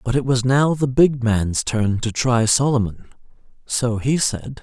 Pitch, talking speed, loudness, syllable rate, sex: 120 Hz, 180 wpm, -19 LUFS, 4.0 syllables/s, male